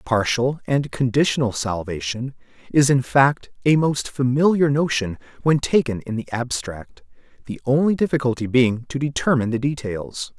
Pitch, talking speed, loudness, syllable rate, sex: 130 Hz, 140 wpm, -21 LUFS, 4.8 syllables/s, male